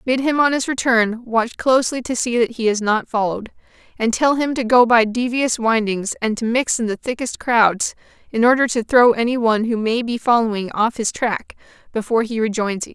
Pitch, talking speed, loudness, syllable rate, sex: 235 Hz, 215 wpm, -18 LUFS, 5.3 syllables/s, female